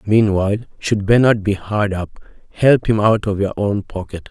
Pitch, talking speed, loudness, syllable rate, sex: 100 Hz, 180 wpm, -17 LUFS, 4.9 syllables/s, male